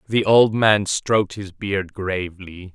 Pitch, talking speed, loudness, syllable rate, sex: 100 Hz, 155 wpm, -19 LUFS, 3.8 syllables/s, male